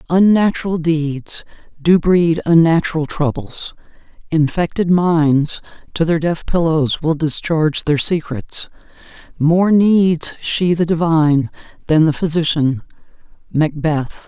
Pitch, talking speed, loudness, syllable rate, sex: 165 Hz, 105 wpm, -16 LUFS, 3.9 syllables/s, female